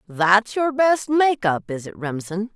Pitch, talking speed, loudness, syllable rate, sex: 220 Hz, 165 wpm, -20 LUFS, 3.8 syllables/s, female